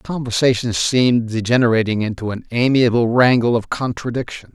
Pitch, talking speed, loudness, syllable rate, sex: 115 Hz, 130 wpm, -17 LUFS, 5.6 syllables/s, male